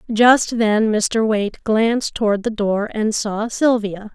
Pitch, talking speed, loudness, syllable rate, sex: 220 Hz, 160 wpm, -18 LUFS, 3.8 syllables/s, female